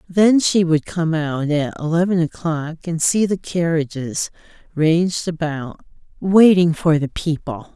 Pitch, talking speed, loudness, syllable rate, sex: 165 Hz, 140 wpm, -18 LUFS, 4.0 syllables/s, female